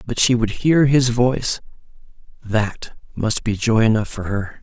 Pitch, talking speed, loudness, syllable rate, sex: 115 Hz, 155 wpm, -19 LUFS, 4.3 syllables/s, male